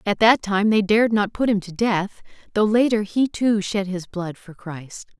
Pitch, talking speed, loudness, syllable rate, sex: 205 Hz, 220 wpm, -20 LUFS, 4.5 syllables/s, female